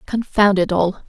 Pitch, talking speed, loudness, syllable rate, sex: 195 Hz, 165 wpm, -17 LUFS, 4.3 syllables/s, female